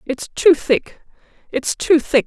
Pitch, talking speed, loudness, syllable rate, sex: 295 Hz, 160 wpm, -17 LUFS, 3.5 syllables/s, female